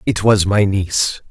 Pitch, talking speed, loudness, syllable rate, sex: 100 Hz, 185 wpm, -15 LUFS, 4.4 syllables/s, male